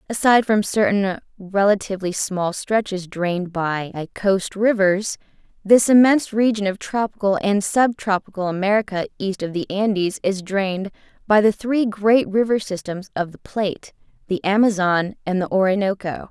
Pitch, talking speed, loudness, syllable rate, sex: 200 Hz, 140 wpm, -20 LUFS, 4.8 syllables/s, female